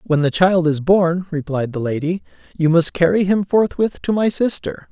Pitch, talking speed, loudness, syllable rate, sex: 175 Hz, 195 wpm, -18 LUFS, 4.8 syllables/s, male